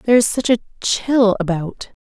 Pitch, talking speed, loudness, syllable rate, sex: 215 Hz, 120 wpm, -17 LUFS, 4.7 syllables/s, female